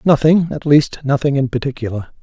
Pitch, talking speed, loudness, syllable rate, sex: 140 Hz, 160 wpm, -16 LUFS, 5.6 syllables/s, male